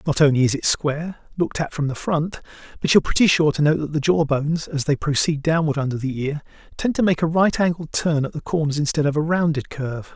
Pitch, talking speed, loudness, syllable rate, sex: 155 Hz, 255 wpm, -21 LUFS, 6.3 syllables/s, male